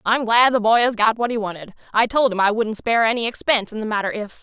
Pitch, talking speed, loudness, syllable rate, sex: 225 Hz, 285 wpm, -19 LUFS, 6.6 syllables/s, female